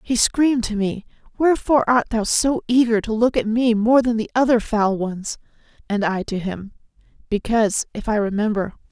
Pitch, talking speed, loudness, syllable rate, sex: 225 Hz, 180 wpm, -20 LUFS, 5.3 syllables/s, female